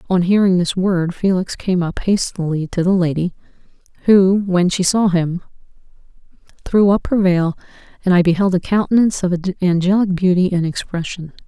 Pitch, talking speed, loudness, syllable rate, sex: 185 Hz, 155 wpm, -17 LUFS, 5.2 syllables/s, female